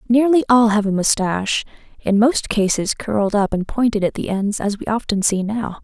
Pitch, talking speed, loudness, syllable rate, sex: 215 Hz, 205 wpm, -18 LUFS, 5.1 syllables/s, female